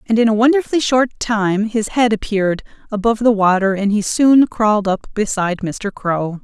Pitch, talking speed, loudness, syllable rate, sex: 215 Hz, 185 wpm, -16 LUFS, 5.3 syllables/s, female